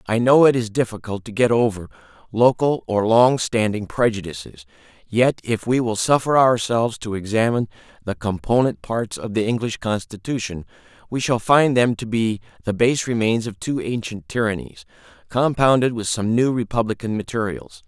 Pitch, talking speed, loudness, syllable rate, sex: 110 Hz, 160 wpm, -20 LUFS, 5.1 syllables/s, male